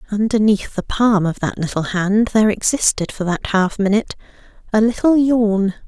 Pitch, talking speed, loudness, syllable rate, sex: 210 Hz, 165 wpm, -17 LUFS, 5.0 syllables/s, female